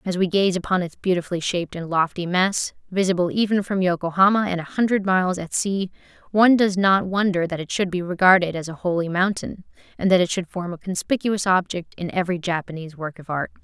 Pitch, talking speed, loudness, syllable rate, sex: 180 Hz, 205 wpm, -21 LUFS, 6.0 syllables/s, female